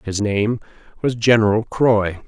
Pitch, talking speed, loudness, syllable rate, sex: 110 Hz, 130 wpm, -18 LUFS, 4.1 syllables/s, male